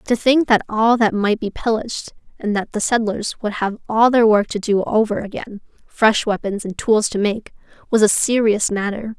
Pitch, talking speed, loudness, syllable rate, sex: 215 Hz, 200 wpm, -18 LUFS, 4.9 syllables/s, female